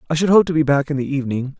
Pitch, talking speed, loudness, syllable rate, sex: 145 Hz, 340 wpm, -18 LUFS, 7.9 syllables/s, male